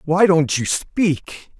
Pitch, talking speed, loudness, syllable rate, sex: 165 Hz, 150 wpm, -18 LUFS, 2.8 syllables/s, male